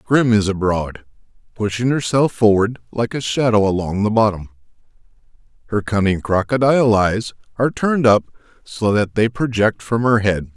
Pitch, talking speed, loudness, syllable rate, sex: 110 Hz, 150 wpm, -17 LUFS, 5.0 syllables/s, male